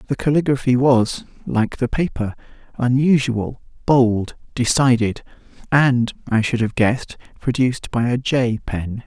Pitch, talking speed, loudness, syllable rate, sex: 125 Hz, 125 wpm, -19 LUFS, 4.3 syllables/s, male